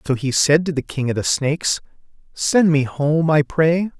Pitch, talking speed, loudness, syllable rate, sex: 150 Hz, 210 wpm, -18 LUFS, 4.6 syllables/s, male